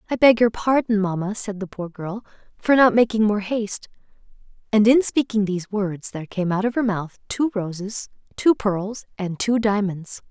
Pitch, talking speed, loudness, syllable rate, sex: 210 Hz, 185 wpm, -21 LUFS, 4.9 syllables/s, female